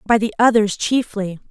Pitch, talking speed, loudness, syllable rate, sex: 215 Hz, 160 wpm, -18 LUFS, 4.8 syllables/s, female